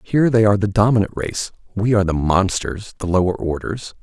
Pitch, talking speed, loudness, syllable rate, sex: 100 Hz, 165 wpm, -19 LUFS, 5.9 syllables/s, male